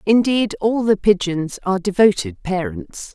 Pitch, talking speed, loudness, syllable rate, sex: 190 Hz, 135 wpm, -18 LUFS, 4.5 syllables/s, female